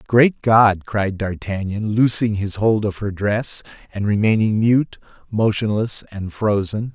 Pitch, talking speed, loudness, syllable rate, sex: 105 Hz, 140 wpm, -19 LUFS, 3.9 syllables/s, male